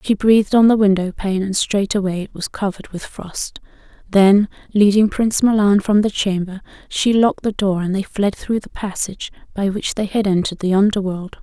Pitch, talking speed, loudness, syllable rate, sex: 200 Hz, 195 wpm, -17 LUFS, 5.3 syllables/s, female